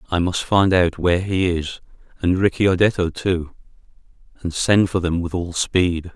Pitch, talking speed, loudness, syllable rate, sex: 90 Hz, 165 wpm, -19 LUFS, 4.5 syllables/s, male